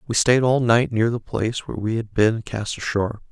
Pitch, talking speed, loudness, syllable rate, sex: 115 Hz, 235 wpm, -21 LUFS, 5.5 syllables/s, male